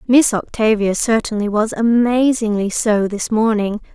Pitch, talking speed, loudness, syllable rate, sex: 220 Hz, 120 wpm, -16 LUFS, 4.4 syllables/s, female